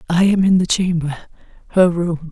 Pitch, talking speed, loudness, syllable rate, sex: 175 Hz, 155 wpm, -17 LUFS, 5.3 syllables/s, female